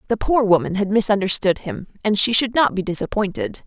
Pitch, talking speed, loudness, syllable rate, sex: 200 Hz, 195 wpm, -19 LUFS, 5.8 syllables/s, female